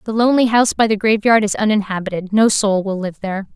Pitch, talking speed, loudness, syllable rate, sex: 210 Hz, 220 wpm, -16 LUFS, 6.5 syllables/s, female